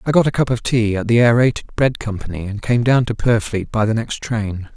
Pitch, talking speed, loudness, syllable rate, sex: 115 Hz, 250 wpm, -18 LUFS, 5.5 syllables/s, male